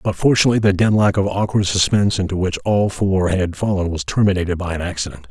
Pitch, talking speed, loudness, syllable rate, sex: 95 Hz, 205 wpm, -18 LUFS, 6.4 syllables/s, male